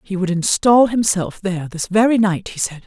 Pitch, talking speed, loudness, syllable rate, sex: 195 Hz, 210 wpm, -17 LUFS, 5.2 syllables/s, female